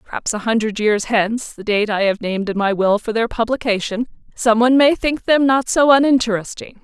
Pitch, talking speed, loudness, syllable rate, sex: 230 Hz, 195 wpm, -17 LUFS, 5.6 syllables/s, female